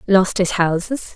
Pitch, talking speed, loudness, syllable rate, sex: 190 Hz, 155 wpm, -18 LUFS, 4.0 syllables/s, female